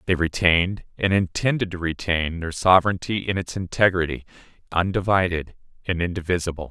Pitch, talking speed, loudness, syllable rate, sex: 90 Hz, 115 wpm, -22 LUFS, 5.6 syllables/s, male